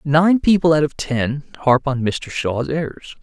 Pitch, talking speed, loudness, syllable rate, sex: 150 Hz, 185 wpm, -18 LUFS, 4.1 syllables/s, male